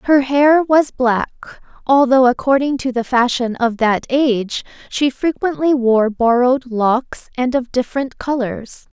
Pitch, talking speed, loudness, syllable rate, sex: 255 Hz, 140 wpm, -16 LUFS, 4.1 syllables/s, female